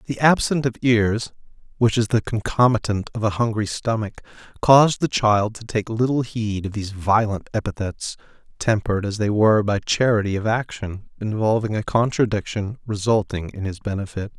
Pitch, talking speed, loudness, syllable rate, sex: 110 Hz, 160 wpm, -21 LUFS, 5.3 syllables/s, male